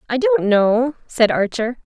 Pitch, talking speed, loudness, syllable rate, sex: 225 Hz, 155 wpm, -18 LUFS, 4.0 syllables/s, female